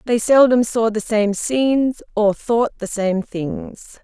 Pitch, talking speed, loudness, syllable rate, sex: 225 Hz, 165 wpm, -18 LUFS, 3.7 syllables/s, female